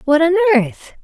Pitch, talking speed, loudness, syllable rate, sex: 305 Hz, 175 wpm, -14 LUFS, 6.3 syllables/s, female